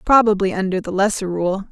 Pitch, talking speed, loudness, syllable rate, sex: 195 Hz, 175 wpm, -18 LUFS, 5.7 syllables/s, female